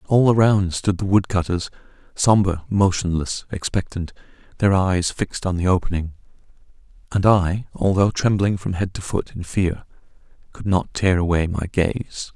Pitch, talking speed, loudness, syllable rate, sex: 95 Hz, 145 wpm, -21 LUFS, 4.6 syllables/s, male